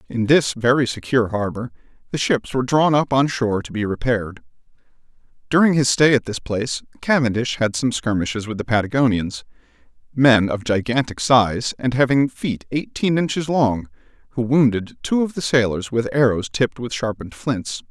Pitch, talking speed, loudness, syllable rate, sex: 120 Hz, 160 wpm, -19 LUFS, 5.3 syllables/s, male